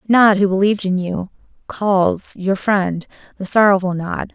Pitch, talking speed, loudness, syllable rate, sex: 195 Hz, 140 wpm, -17 LUFS, 4.3 syllables/s, female